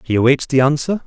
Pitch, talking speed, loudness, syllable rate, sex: 140 Hz, 225 wpm, -16 LUFS, 6.2 syllables/s, male